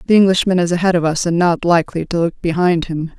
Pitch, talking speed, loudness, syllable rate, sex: 175 Hz, 245 wpm, -16 LUFS, 6.4 syllables/s, female